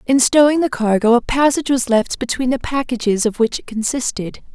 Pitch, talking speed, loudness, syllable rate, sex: 245 Hz, 200 wpm, -17 LUFS, 5.5 syllables/s, female